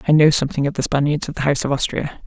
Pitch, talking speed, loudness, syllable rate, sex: 145 Hz, 290 wpm, -19 LUFS, 7.7 syllables/s, female